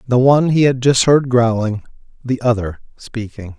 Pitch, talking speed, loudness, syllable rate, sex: 120 Hz, 165 wpm, -15 LUFS, 4.8 syllables/s, male